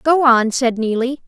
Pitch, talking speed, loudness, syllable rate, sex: 250 Hz, 190 wpm, -16 LUFS, 4.5 syllables/s, female